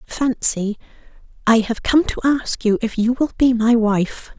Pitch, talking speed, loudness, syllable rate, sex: 235 Hz, 180 wpm, -18 LUFS, 4.1 syllables/s, female